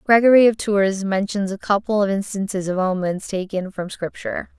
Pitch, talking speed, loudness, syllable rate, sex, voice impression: 200 Hz, 170 wpm, -20 LUFS, 5.2 syllables/s, female, feminine, slightly young, fluent, slightly cute, slightly calm, friendly